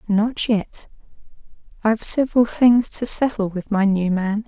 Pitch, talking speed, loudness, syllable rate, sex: 215 Hz, 150 wpm, -19 LUFS, 4.4 syllables/s, female